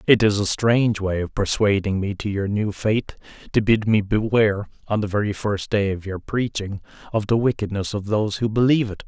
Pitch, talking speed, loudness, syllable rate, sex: 105 Hz, 210 wpm, -21 LUFS, 5.6 syllables/s, male